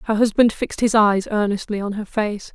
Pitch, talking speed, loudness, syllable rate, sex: 215 Hz, 210 wpm, -19 LUFS, 5.3 syllables/s, female